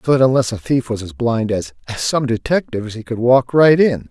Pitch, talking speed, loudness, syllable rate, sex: 120 Hz, 235 wpm, -17 LUFS, 5.4 syllables/s, male